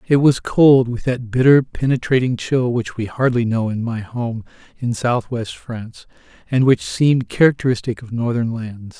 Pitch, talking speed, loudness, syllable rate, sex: 120 Hz, 165 wpm, -18 LUFS, 4.7 syllables/s, male